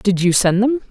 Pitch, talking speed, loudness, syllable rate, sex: 210 Hz, 265 wpm, -15 LUFS, 5.0 syllables/s, female